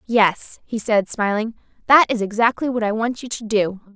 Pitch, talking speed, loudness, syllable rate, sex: 220 Hz, 195 wpm, -19 LUFS, 4.8 syllables/s, female